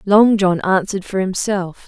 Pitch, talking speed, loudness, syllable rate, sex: 190 Hz, 160 wpm, -17 LUFS, 4.6 syllables/s, female